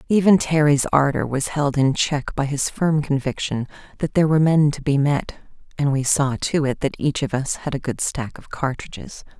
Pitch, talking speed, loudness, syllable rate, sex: 145 Hz, 210 wpm, -20 LUFS, 5.0 syllables/s, female